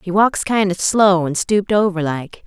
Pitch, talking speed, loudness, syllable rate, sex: 190 Hz, 220 wpm, -17 LUFS, 4.7 syllables/s, female